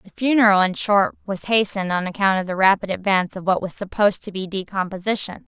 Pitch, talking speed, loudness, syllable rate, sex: 195 Hz, 205 wpm, -20 LUFS, 6.2 syllables/s, female